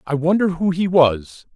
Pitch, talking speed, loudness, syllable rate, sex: 165 Hz, 195 wpm, -17 LUFS, 4.4 syllables/s, male